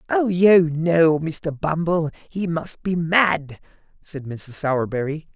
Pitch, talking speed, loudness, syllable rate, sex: 160 Hz, 135 wpm, -20 LUFS, 3.5 syllables/s, male